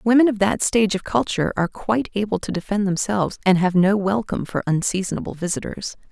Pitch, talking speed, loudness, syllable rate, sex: 200 Hz, 185 wpm, -21 LUFS, 6.4 syllables/s, female